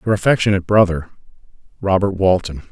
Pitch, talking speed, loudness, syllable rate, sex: 95 Hz, 110 wpm, -17 LUFS, 6.6 syllables/s, male